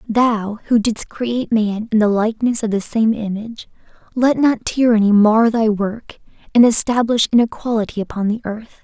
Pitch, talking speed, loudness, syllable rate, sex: 225 Hz, 165 wpm, -17 LUFS, 5.0 syllables/s, female